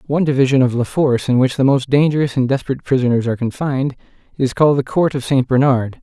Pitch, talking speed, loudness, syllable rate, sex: 135 Hz, 220 wpm, -16 LUFS, 7.0 syllables/s, male